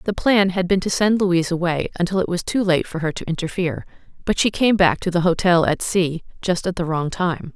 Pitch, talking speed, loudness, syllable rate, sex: 180 Hz, 245 wpm, -20 LUFS, 5.6 syllables/s, female